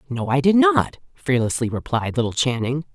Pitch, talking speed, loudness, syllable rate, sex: 140 Hz, 165 wpm, -20 LUFS, 5.3 syllables/s, female